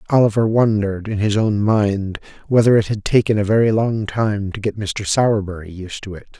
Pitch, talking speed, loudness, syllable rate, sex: 105 Hz, 195 wpm, -18 LUFS, 5.3 syllables/s, male